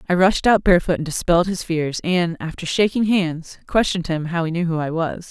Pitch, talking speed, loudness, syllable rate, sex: 175 Hz, 225 wpm, -20 LUFS, 5.6 syllables/s, female